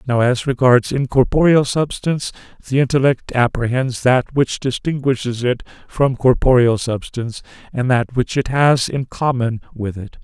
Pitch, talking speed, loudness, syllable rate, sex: 125 Hz, 140 wpm, -17 LUFS, 4.7 syllables/s, male